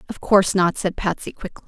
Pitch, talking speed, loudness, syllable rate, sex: 190 Hz, 215 wpm, -20 LUFS, 6.1 syllables/s, female